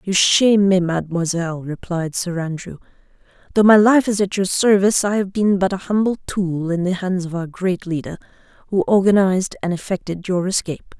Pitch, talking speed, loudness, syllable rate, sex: 185 Hz, 185 wpm, -18 LUFS, 5.5 syllables/s, female